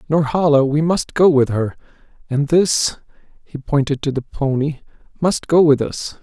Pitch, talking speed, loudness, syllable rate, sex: 145 Hz, 145 wpm, -17 LUFS, 4.7 syllables/s, male